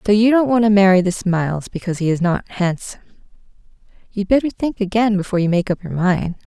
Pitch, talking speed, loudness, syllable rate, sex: 195 Hz, 210 wpm, -18 LUFS, 6.4 syllables/s, female